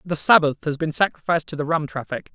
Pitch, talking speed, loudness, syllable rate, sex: 155 Hz, 230 wpm, -21 LUFS, 6.5 syllables/s, male